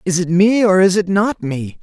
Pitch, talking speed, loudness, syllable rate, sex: 185 Hz, 260 wpm, -15 LUFS, 4.7 syllables/s, male